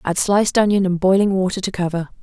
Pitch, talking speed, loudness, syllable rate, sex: 190 Hz, 215 wpm, -18 LUFS, 6.3 syllables/s, female